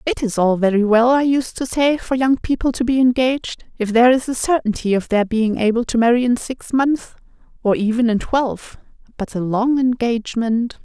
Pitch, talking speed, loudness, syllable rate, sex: 240 Hz, 205 wpm, -18 LUFS, 5.3 syllables/s, female